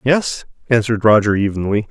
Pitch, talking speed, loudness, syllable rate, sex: 110 Hz, 125 wpm, -16 LUFS, 5.7 syllables/s, male